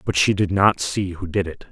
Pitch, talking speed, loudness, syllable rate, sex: 90 Hz, 280 wpm, -20 LUFS, 5.0 syllables/s, male